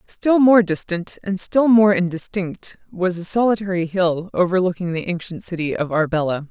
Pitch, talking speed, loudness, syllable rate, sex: 185 Hz, 155 wpm, -19 LUFS, 4.9 syllables/s, female